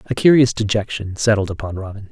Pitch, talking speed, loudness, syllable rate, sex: 105 Hz, 170 wpm, -18 LUFS, 6.0 syllables/s, male